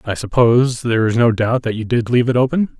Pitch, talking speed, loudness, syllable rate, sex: 120 Hz, 255 wpm, -16 LUFS, 6.4 syllables/s, male